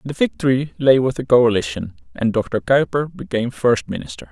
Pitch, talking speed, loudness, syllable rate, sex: 120 Hz, 165 wpm, -18 LUFS, 5.5 syllables/s, male